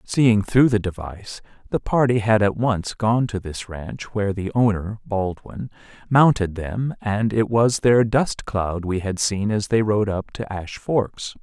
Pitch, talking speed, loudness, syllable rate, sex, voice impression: 105 Hz, 185 wpm, -21 LUFS, 4.0 syllables/s, male, very masculine, very middle-aged, very thick, slightly tensed, slightly weak, slightly bright, slightly soft, slightly muffled, fluent, slightly raspy, cool, very intellectual, refreshing, sincere, calm, slightly mature, very friendly, reassuring, unique, elegant, wild, sweet, slightly lively, kind, slightly modest